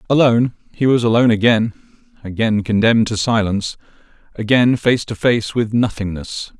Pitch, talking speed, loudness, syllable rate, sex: 115 Hz, 110 wpm, -16 LUFS, 5.5 syllables/s, male